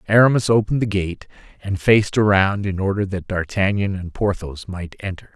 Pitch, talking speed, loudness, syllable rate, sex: 100 Hz, 170 wpm, -20 LUFS, 5.4 syllables/s, male